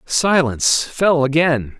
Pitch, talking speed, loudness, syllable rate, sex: 145 Hz, 100 wpm, -16 LUFS, 3.6 syllables/s, male